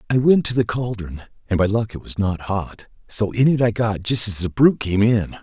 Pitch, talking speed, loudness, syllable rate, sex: 110 Hz, 255 wpm, -20 LUFS, 5.3 syllables/s, male